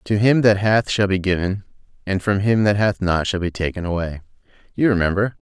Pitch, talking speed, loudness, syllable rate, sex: 100 Hz, 210 wpm, -19 LUFS, 5.5 syllables/s, male